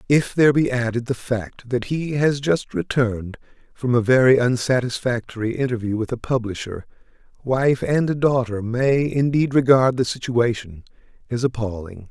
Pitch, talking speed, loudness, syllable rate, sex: 125 Hz, 145 wpm, -20 LUFS, 4.7 syllables/s, male